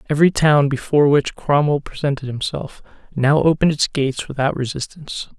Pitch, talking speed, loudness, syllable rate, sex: 145 Hz, 145 wpm, -18 LUFS, 5.8 syllables/s, male